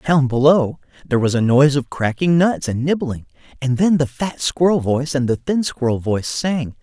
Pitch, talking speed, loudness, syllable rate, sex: 140 Hz, 200 wpm, -18 LUFS, 5.3 syllables/s, male